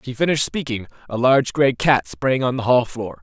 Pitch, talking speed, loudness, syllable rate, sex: 125 Hz, 240 wpm, -19 LUFS, 5.7 syllables/s, male